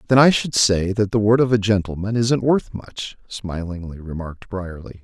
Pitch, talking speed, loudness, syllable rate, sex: 105 Hz, 190 wpm, -20 LUFS, 4.9 syllables/s, male